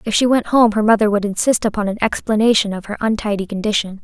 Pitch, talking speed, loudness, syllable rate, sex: 215 Hz, 225 wpm, -17 LUFS, 6.5 syllables/s, female